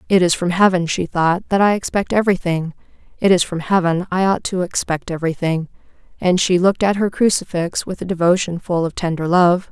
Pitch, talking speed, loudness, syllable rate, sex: 180 Hz, 200 wpm, -18 LUFS, 5.7 syllables/s, female